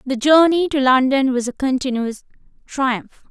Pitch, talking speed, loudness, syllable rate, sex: 265 Hz, 145 wpm, -17 LUFS, 4.5 syllables/s, female